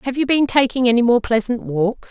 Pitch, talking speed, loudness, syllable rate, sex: 240 Hz, 230 wpm, -17 LUFS, 5.5 syllables/s, female